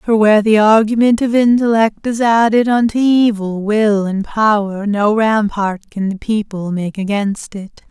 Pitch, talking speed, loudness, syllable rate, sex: 215 Hz, 160 wpm, -14 LUFS, 4.3 syllables/s, female